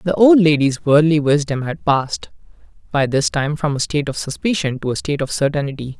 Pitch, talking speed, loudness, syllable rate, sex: 150 Hz, 200 wpm, -17 LUFS, 5.6 syllables/s, male